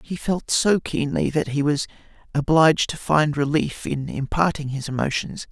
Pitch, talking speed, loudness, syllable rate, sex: 145 Hz, 165 wpm, -22 LUFS, 4.7 syllables/s, male